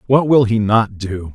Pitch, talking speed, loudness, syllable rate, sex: 110 Hz, 225 wpm, -15 LUFS, 4.2 syllables/s, male